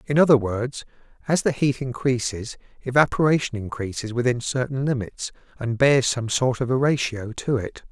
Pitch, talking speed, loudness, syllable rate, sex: 125 Hz, 160 wpm, -23 LUFS, 5.0 syllables/s, male